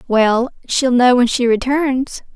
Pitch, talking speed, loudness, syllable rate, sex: 250 Hz, 155 wpm, -15 LUFS, 3.6 syllables/s, female